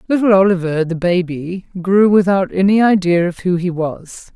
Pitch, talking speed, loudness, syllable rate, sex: 185 Hz, 165 wpm, -15 LUFS, 4.7 syllables/s, female